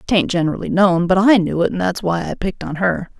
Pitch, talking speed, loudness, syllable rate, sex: 185 Hz, 265 wpm, -17 LUFS, 6.0 syllables/s, female